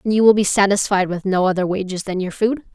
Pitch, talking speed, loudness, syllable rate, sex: 195 Hz, 260 wpm, -18 LUFS, 6.2 syllables/s, female